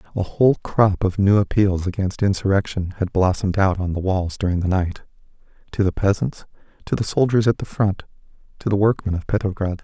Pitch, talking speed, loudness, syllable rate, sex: 100 Hz, 185 wpm, -20 LUFS, 5.7 syllables/s, male